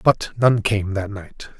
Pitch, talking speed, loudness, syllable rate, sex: 105 Hz, 190 wpm, -20 LUFS, 3.6 syllables/s, male